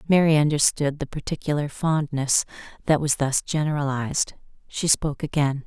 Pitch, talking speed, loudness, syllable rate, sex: 145 Hz, 125 wpm, -23 LUFS, 5.3 syllables/s, female